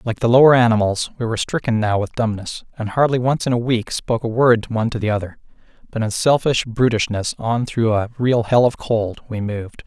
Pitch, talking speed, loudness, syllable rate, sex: 115 Hz, 220 wpm, -18 LUFS, 5.7 syllables/s, male